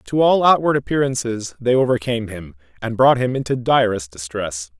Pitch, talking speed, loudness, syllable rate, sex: 125 Hz, 165 wpm, -18 LUFS, 5.3 syllables/s, male